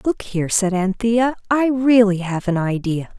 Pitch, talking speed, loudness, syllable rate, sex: 210 Hz, 170 wpm, -18 LUFS, 4.4 syllables/s, female